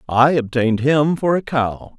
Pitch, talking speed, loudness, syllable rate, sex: 135 Hz, 180 wpm, -17 LUFS, 4.4 syllables/s, male